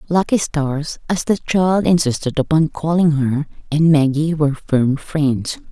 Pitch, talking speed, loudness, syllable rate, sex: 150 Hz, 145 wpm, -17 LUFS, 4.1 syllables/s, female